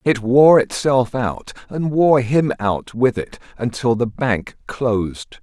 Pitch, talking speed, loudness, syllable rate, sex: 120 Hz, 155 wpm, -18 LUFS, 3.5 syllables/s, male